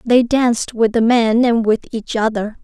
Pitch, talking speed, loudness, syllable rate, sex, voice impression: 230 Hz, 205 wpm, -16 LUFS, 4.4 syllables/s, female, very feminine, slightly young, adult-like, very thin, tensed, slightly weak, bright, hard, very clear, fluent, cute, intellectual, refreshing, sincere, calm, friendly, very reassuring, unique, elegant, very sweet, slightly lively, slightly kind, sharp, slightly modest